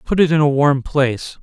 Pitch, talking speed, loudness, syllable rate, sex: 145 Hz, 250 wpm, -16 LUFS, 5.4 syllables/s, male